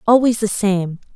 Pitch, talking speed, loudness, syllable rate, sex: 210 Hz, 155 wpm, -17 LUFS, 4.5 syllables/s, female